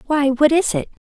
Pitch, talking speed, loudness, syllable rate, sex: 280 Hz, 225 wpm, -17 LUFS, 5.4 syllables/s, female